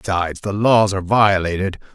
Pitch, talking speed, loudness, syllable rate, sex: 100 Hz, 155 wpm, -17 LUFS, 5.7 syllables/s, male